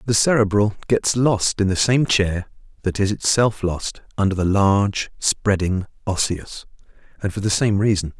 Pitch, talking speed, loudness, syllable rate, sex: 100 Hz, 160 wpm, -20 LUFS, 4.6 syllables/s, male